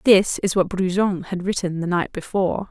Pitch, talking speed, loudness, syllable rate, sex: 185 Hz, 200 wpm, -21 LUFS, 5.1 syllables/s, female